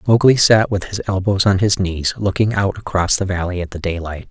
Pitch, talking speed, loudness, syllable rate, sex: 95 Hz, 225 wpm, -17 LUFS, 5.4 syllables/s, male